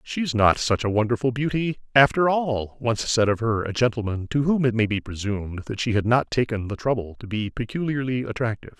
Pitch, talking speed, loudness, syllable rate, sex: 115 Hz, 210 wpm, -23 LUFS, 5.6 syllables/s, male